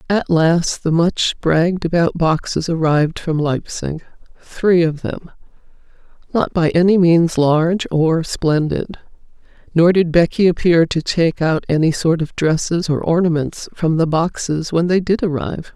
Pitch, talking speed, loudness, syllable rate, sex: 165 Hz, 150 wpm, -17 LUFS, 4.4 syllables/s, female